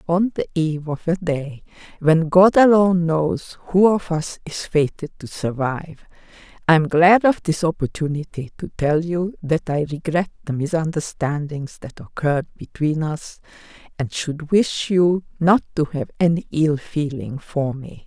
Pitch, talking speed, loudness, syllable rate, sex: 160 Hz, 155 wpm, -20 LUFS, 4.4 syllables/s, female